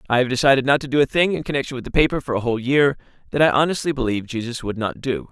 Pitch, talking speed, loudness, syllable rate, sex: 130 Hz, 280 wpm, -20 LUFS, 7.6 syllables/s, male